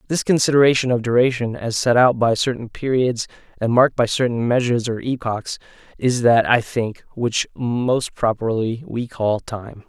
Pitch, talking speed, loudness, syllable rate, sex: 120 Hz, 165 wpm, -19 LUFS, 4.8 syllables/s, male